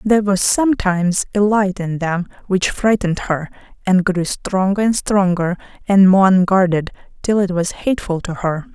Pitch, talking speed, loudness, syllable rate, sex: 190 Hz, 165 wpm, -17 LUFS, 4.9 syllables/s, female